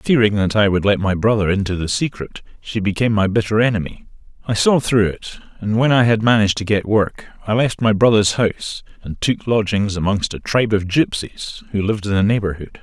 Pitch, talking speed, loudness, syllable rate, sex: 105 Hz, 210 wpm, -18 LUFS, 5.6 syllables/s, male